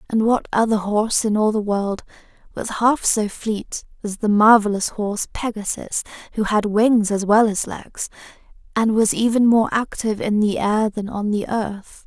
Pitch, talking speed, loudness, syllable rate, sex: 215 Hz, 180 wpm, -20 LUFS, 4.6 syllables/s, female